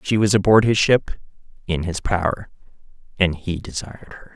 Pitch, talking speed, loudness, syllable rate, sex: 95 Hz, 165 wpm, -20 LUFS, 5.2 syllables/s, male